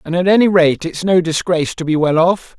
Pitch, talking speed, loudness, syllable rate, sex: 170 Hz, 280 wpm, -14 LUFS, 6.0 syllables/s, male